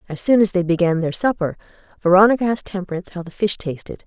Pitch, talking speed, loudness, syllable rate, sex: 185 Hz, 205 wpm, -19 LUFS, 6.9 syllables/s, female